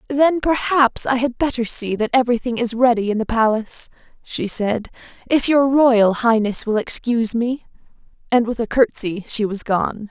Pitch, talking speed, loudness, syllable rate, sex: 235 Hz, 170 wpm, -18 LUFS, 4.9 syllables/s, female